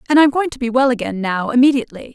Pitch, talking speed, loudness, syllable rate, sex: 250 Hz, 250 wpm, -16 LUFS, 7.2 syllables/s, female